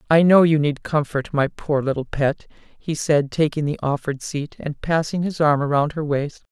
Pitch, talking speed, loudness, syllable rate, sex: 150 Hz, 205 wpm, -21 LUFS, 4.6 syllables/s, female